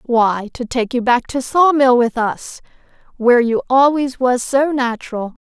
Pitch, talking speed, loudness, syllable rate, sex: 250 Hz, 175 wpm, -16 LUFS, 4.4 syllables/s, female